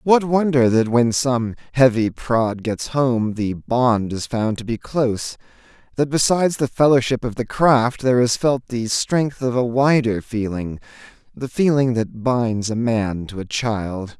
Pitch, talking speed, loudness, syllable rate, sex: 120 Hz, 170 wpm, -19 LUFS, 4.1 syllables/s, male